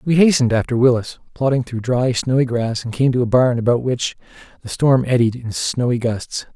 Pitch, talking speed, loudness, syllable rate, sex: 125 Hz, 200 wpm, -18 LUFS, 5.4 syllables/s, male